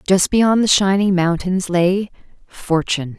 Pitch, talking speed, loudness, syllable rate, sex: 185 Hz, 115 wpm, -16 LUFS, 4.1 syllables/s, female